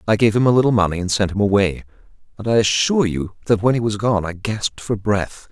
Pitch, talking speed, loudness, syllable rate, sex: 105 Hz, 250 wpm, -18 LUFS, 6.2 syllables/s, male